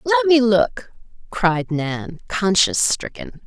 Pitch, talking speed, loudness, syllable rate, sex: 215 Hz, 120 wpm, -18 LUFS, 3.5 syllables/s, female